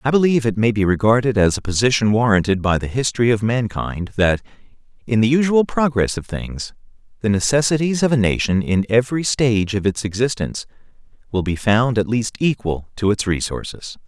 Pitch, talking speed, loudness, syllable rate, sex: 115 Hz, 180 wpm, -18 LUFS, 5.7 syllables/s, male